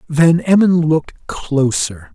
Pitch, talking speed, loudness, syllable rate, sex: 155 Hz, 110 wpm, -15 LUFS, 3.5 syllables/s, male